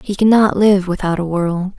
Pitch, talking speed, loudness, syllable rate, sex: 190 Hz, 200 wpm, -15 LUFS, 4.7 syllables/s, female